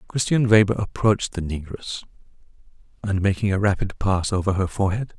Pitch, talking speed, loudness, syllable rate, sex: 100 Hz, 150 wpm, -22 LUFS, 5.7 syllables/s, male